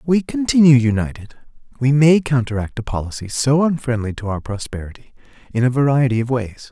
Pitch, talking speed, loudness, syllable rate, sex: 130 Hz, 170 wpm, -18 LUFS, 5.7 syllables/s, male